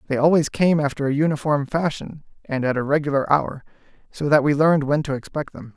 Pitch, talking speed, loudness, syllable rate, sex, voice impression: 145 Hz, 210 wpm, -21 LUFS, 6.0 syllables/s, male, masculine, adult-like, slightly refreshing, sincere, slightly calm, slightly elegant